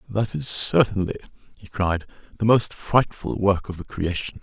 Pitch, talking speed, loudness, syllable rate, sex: 100 Hz, 165 wpm, -23 LUFS, 4.7 syllables/s, male